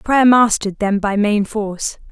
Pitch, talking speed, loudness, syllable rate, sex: 215 Hz, 170 wpm, -16 LUFS, 4.7 syllables/s, female